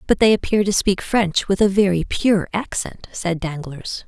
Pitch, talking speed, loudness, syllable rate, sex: 190 Hz, 190 wpm, -19 LUFS, 4.4 syllables/s, female